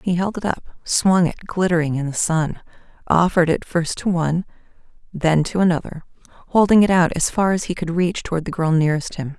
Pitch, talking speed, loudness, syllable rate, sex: 170 Hz, 205 wpm, -19 LUFS, 5.8 syllables/s, female